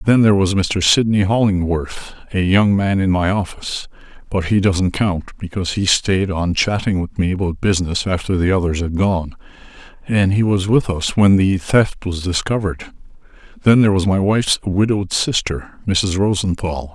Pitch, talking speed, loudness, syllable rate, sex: 95 Hz, 175 wpm, -17 LUFS, 5.0 syllables/s, male